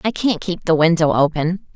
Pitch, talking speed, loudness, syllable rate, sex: 170 Hz, 205 wpm, -17 LUFS, 5.0 syllables/s, female